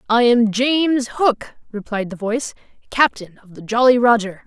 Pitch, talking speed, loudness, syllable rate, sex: 230 Hz, 160 wpm, -17 LUFS, 4.8 syllables/s, female